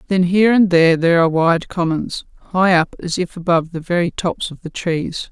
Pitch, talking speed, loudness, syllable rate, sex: 175 Hz, 215 wpm, -17 LUFS, 5.6 syllables/s, female